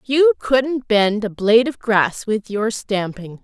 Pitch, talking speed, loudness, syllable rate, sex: 215 Hz, 175 wpm, -18 LUFS, 3.7 syllables/s, female